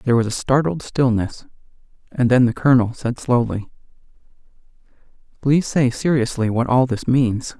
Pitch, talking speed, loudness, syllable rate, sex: 125 Hz, 140 wpm, -19 LUFS, 5.2 syllables/s, male